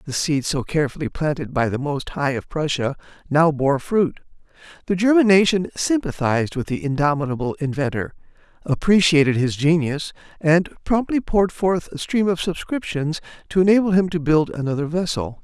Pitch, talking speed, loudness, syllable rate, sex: 160 Hz, 155 wpm, -20 LUFS, 5.3 syllables/s, male